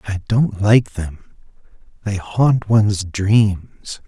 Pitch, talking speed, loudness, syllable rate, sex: 100 Hz, 120 wpm, -17 LUFS, 3.0 syllables/s, male